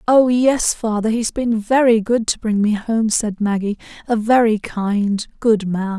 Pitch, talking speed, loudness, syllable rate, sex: 220 Hz, 170 wpm, -18 LUFS, 4.0 syllables/s, female